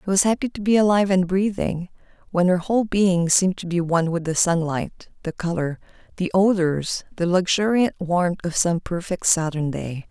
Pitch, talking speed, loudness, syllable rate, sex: 180 Hz, 185 wpm, -21 LUFS, 5.0 syllables/s, female